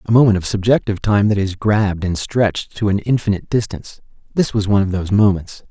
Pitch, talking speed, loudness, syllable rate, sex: 100 Hz, 210 wpm, -17 LUFS, 6.5 syllables/s, male